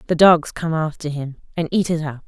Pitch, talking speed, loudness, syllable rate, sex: 160 Hz, 240 wpm, -20 LUFS, 5.4 syllables/s, female